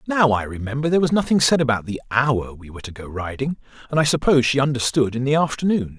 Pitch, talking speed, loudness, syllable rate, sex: 130 Hz, 230 wpm, -20 LUFS, 6.7 syllables/s, male